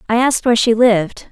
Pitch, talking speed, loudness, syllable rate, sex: 230 Hz, 230 wpm, -14 LUFS, 7.1 syllables/s, female